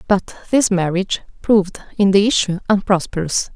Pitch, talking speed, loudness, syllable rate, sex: 195 Hz, 135 wpm, -17 LUFS, 5.3 syllables/s, female